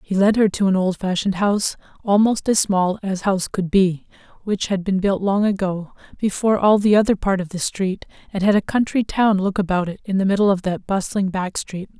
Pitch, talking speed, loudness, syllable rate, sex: 195 Hz, 220 wpm, -19 LUFS, 5.5 syllables/s, female